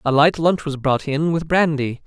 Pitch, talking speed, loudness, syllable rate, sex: 150 Hz, 235 wpm, -19 LUFS, 4.6 syllables/s, male